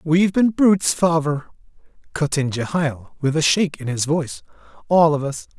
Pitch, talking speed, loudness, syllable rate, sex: 155 Hz, 170 wpm, -19 LUFS, 5.2 syllables/s, male